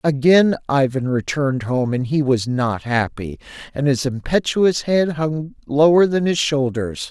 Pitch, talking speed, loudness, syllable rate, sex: 140 Hz, 150 wpm, -18 LUFS, 4.2 syllables/s, male